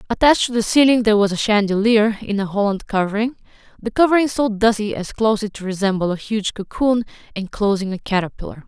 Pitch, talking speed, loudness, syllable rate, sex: 215 Hz, 175 wpm, -18 LUFS, 6.2 syllables/s, female